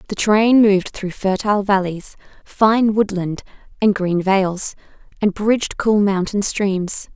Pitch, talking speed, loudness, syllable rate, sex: 200 Hz, 135 wpm, -18 LUFS, 4.0 syllables/s, female